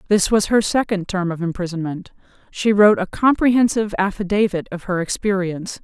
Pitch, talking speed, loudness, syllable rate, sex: 195 Hz, 155 wpm, -19 LUFS, 5.7 syllables/s, female